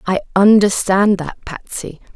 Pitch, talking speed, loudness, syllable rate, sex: 190 Hz, 110 wpm, -14 LUFS, 4.1 syllables/s, female